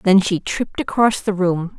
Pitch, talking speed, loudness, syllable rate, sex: 190 Hz, 200 wpm, -19 LUFS, 4.6 syllables/s, female